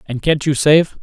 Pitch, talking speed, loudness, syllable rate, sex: 150 Hz, 235 wpm, -15 LUFS, 4.4 syllables/s, male